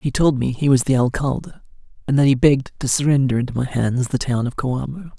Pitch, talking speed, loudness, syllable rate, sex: 135 Hz, 230 wpm, -19 LUFS, 6.0 syllables/s, male